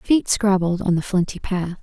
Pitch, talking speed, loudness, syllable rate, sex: 190 Hz, 195 wpm, -20 LUFS, 4.8 syllables/s, female